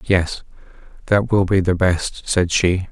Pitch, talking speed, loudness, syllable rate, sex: 95 Hz, 165 wpm, -18 LUFS, 3.8 syllables/s, male